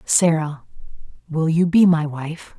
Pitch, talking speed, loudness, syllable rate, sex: 160 Hz, 140 wpm, -19 LUFS, 3.8 syllables/s, female